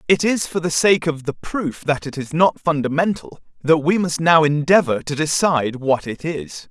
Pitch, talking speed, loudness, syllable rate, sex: 155 Hz, 205 wpm, -19 LUFS, 4.8 syllables/s, male